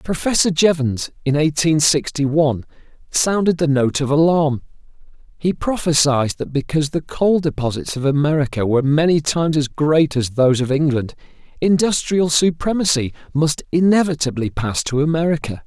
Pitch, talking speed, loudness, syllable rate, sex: 150 Hz, 140 wpm, -18 LUFS, 5.2 syllables/s, male